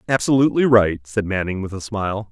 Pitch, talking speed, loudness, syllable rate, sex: 105 Hz, 180 wpm, -19 LUFS, 6.1 syllables/s, male